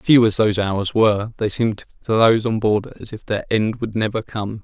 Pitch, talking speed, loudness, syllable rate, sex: 110 Hz, 235 wpm, -19 LUFS, 5.5 syllables/s, male